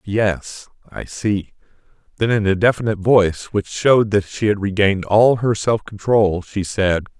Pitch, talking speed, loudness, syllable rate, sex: 105 Hz, 165 wpm, -18 LUFS, 4.6 syllables/s, male